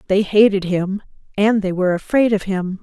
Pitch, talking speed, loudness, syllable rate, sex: 200 Hz, 190 wpm, -17 LUFS, 5.3 syllables/s, female